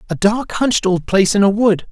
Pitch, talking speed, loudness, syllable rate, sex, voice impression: 205 Hz, 250 wpm, -15 LUFS, 5.9 syllables/s, male, masculine, adult-like, slightly middle-aged, thick, very tensed, powerful, bright, slightly hard, clear, fluent, very cool, intellectual, refreshing, very sincere, very calm, very mature, friendly, very reassuring, unique, slightly elegant, wild, sweet, slightly lively, slightly strict, slightly intense